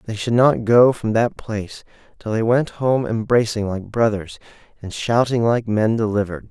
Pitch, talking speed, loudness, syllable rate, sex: 110 Hz, 175 wpm, -19 LUFS, 4.8 syllables/s, male